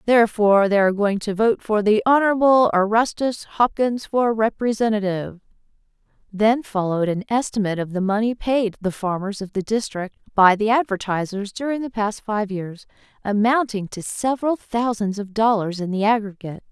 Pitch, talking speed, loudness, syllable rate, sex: 215 Hz, 155 wpm, -20 LUFS, 5.3 syllables/s, female